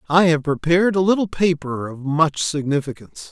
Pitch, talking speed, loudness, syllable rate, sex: 160 Hz, 165 wpm, -19 LUFS, 5.4 syllables/s, male